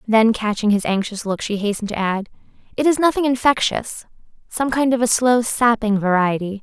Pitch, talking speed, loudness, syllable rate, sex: 225 Hz, 170 wpm, -18 LUFS, 5.4 syllables/s, female